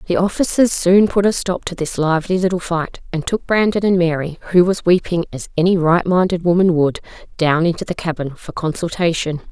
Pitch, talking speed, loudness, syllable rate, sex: 175 Hz, 195 wpm, -17 LUFS, 5.5 syllables/s, female